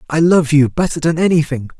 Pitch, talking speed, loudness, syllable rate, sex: 155 Hz, 200 wpm, -14 LUFS, 5.8 syllables/s, male